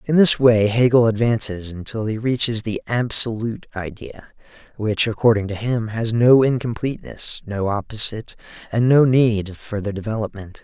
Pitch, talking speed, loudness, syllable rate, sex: 110 Hz, 145 wpm, -19 LUFS, 5.0 syllables/s, male